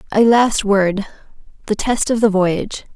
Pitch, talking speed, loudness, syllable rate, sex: 210 Hz, 160 wpm, -16 LUFS, 4.6 syllables/s, female